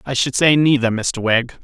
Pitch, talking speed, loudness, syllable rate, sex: 130 Hz, 220 wpm, -16 LUFS, 4.9 syllables/s, male